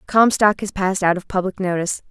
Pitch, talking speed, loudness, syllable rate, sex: 190 Hz, 200 wpm, -19 LUFS, 6.3 syllables/s, female